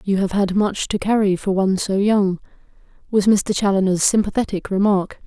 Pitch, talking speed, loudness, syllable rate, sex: 195 Hz, 170 wpm, -19 LUFS, 5.2 syllables/s, female